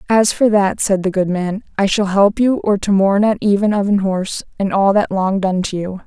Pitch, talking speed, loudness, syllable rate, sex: 200 Hz, 245 wpm, -16 LUFS, 5.3 syllables/s, female